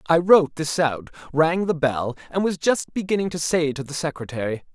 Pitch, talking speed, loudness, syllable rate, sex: 155 Hz, 200 wpm, -22 LUFS, 5.4 syllables/s, male